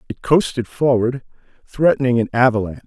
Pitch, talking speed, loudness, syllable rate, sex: 125 Hz, 125 wpm, -17 LUFS, 5.9 syllables/s, male